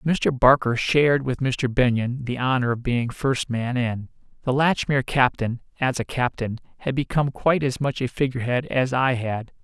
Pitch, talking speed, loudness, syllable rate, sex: 125 Hz, 180 wpm, -23 LUFS, 5.0 syllables/s, male